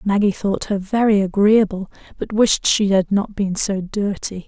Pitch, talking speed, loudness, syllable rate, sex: 200 Hz, 175 wpm, -18 LUFS, 4.4 syllables/s, female